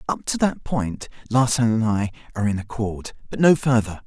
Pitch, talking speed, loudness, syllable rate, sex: 115 Hz, 190 wpm, -22 LUFS, 5.2 syllables/s, male